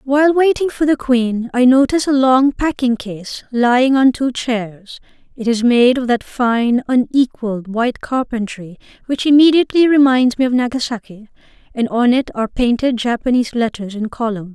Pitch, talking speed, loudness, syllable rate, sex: 245 Hz, 160 wpm, -15 LUFS, 5.0 syllables/s, female